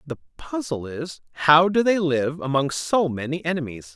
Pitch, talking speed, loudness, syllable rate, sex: 150 Hz, 165 wpm, -22 LUFS, 4.7 syllables/s, male